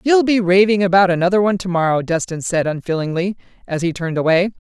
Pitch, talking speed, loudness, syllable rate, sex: 185 Hz, 180 wpm, -17 LUFS, 6.5 syllables/s, female